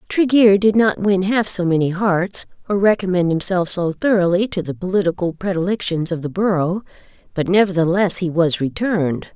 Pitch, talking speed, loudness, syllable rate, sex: 185 Hz, 155 wpm, -18 LUFS, 5.3 syllables/s, female